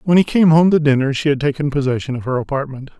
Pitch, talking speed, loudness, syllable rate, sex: 145 Hz, 260 wpm, -16 LUFS, 6.7 syllables/s, male